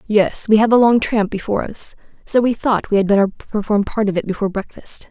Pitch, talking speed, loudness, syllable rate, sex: 210 Hz, 235 wpm, -17 LUFS, 5.8 syllables/s, female